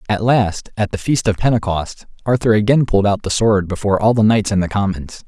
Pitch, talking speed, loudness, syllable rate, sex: 105 Hz, 225 wpm, -16 LUFS, 5.7 syllables/s, male